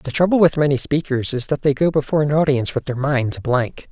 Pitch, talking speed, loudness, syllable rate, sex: 145 Hz, 260 wpm, -19 LUFS, 6.2 syllables/s, male